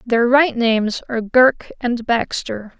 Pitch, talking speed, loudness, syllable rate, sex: 240 Hz, 150 wpm, -17 LUFS, 4.0 syllables/s, female